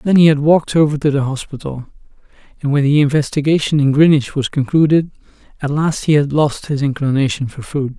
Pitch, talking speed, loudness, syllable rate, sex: 145 Hz, 190 wpm, -15 LUFS, 5.9 syllables/s, male